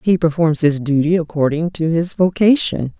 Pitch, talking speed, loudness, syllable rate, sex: 165 Hz, 160 wpm, -16 LUFS, 4.9 syllables/s, female